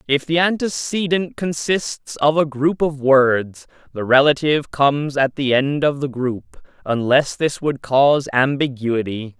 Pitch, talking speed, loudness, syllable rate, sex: 140 Hz, 145 wpm, -18 LUFS, 4.1 syllables/s, male